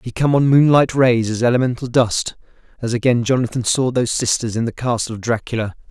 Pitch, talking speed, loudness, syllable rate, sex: 120 Hz, 185 wpm, -17 LUFS, 5.9 syllables/s, male